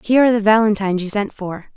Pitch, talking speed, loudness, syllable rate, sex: 210 Hz, 240 wpm, -16 LUFS, 7.3 syllables/s, female